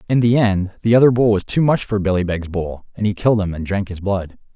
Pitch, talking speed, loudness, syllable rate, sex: 100 Hz, 275 wpm, -18 LUFS, 6.1 syllables/s, male